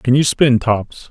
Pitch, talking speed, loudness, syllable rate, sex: 125 Hz, 215 wpm, -15 LUFS, 3.7 syllables/s, male